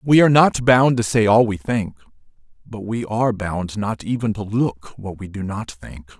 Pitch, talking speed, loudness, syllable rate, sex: 110 Hz, 215 wpm, -19 LUFS, 4.6 syllables/s, male